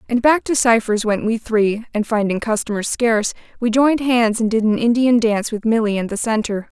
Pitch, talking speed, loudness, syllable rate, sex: 225 Hz, 210 wpm, -18 LUFS, 5.5 syllables/s, female